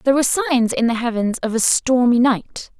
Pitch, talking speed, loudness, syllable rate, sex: 245 Hz, 215 wpm, -17 LUFS, 5.3 syllables/s, female